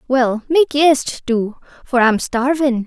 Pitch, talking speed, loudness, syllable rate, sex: 260 Hz, 145 wpm, -16 LUFS, 4.4 syllables/s, female